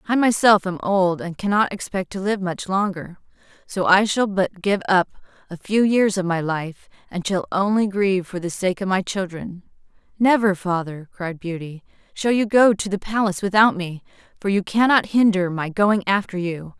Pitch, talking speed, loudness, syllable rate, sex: 190 Hz, 190 wpm, -20 LUFS, 4.9 syllables/s, female